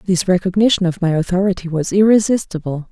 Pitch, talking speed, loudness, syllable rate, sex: 185 Hz, 145 wpm, -16 LUFS, 6.2 syllables/s, female